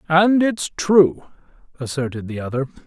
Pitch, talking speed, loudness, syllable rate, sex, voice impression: 155 Hz, 125 wpm, -19 LUFS, 4.7 syllables/s, male, masculine, very adult-like, slightly thick, slightly refreshing, sincere, slightly friendly